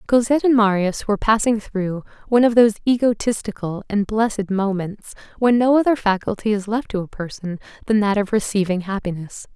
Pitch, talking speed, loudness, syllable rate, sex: 210 Hz, 170 wpm, -19 LUFS, 5.7 syllables/s, female